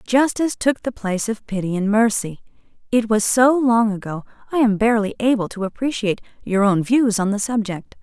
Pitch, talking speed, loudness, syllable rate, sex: 220 Hz, 185 wpm, -19 LUFS, 5.5 syllables/s, female